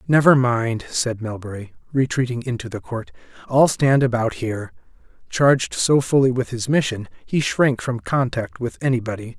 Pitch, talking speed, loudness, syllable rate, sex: 125 Hz, 155 wpm, -20 LUFS, 4.9 syllables/s, male